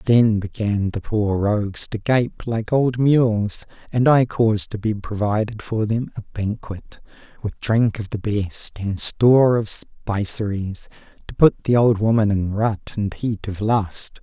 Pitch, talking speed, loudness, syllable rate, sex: 110 Hz, 170 wpm, -20 LUFS, 3.9 syllables/s, male